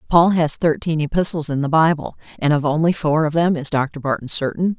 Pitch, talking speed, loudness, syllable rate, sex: 155 Hz, 215 wpm, -18 LUFS, 5.5 syllables/s, female